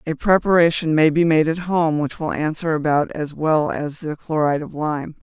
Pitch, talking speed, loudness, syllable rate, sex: 155 Hz, 205 wpm, -19 LUFS, 4.9 syllables/s, female